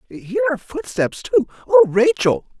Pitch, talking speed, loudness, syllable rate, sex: 170 Hz, 115 wpm, -18 LUFS, 5.3 syllables/s, male